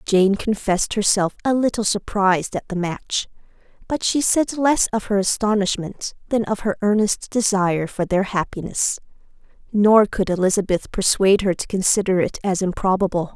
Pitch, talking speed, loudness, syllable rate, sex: 200 Hz, 155 wpm, -20 LUFS, 5.0 syllables/s, female